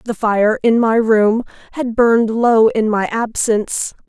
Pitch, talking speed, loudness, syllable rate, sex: 225 Hz, 160 wpm, -15 LUFS, 4.0 syllables/s, female